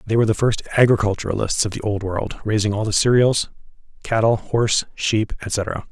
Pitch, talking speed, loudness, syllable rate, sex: 110 Hz, 175 wpm, -20 LUFS, 5.2 syllables/s, male